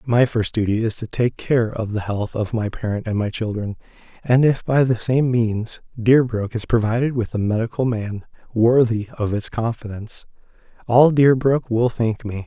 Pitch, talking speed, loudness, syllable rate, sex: 115 Hz, 185 wpm, -20 LUFS, 4.7 syllables/s, male